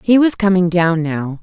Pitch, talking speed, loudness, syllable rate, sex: 180 Hz, 210 wpm, -15 LUFS, 4.6 syllables/s, female